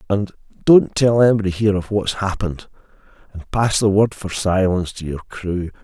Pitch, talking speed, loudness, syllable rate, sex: 100 Hz, 165 wpm, -18 LUFS, 5.4 syllables/s, male